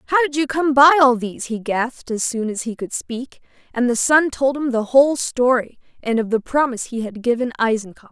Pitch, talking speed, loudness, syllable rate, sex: 250 Hz, 230 wpm, -18 LUFS, 5.6 syllables/s, female